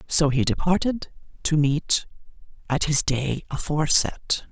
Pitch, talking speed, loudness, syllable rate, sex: 150 Hz, 120 wpm, -23 LUFS, 4.6 syllables/s, female